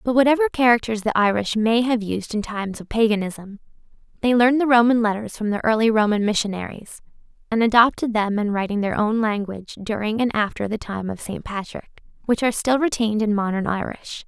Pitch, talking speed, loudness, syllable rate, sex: 220 Hz, 190 wpm, -21 LUFS, 5.9 syllables/s, female